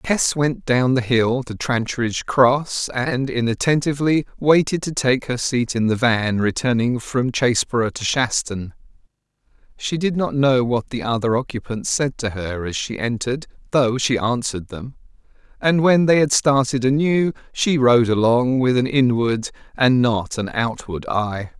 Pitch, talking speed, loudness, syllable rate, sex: 125 Hz, 160 wpm, -19 LUFS, 4.4 syllables/s, male